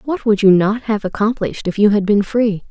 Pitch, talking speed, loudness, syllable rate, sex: 210 Hz, 245 wpm, -16 LUFS, 5.5 syllables/s, female